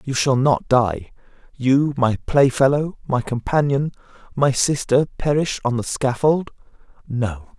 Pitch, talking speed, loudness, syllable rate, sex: 130 Hz, 125 wpm, -20 LUFS, 3.9 syllables/s, male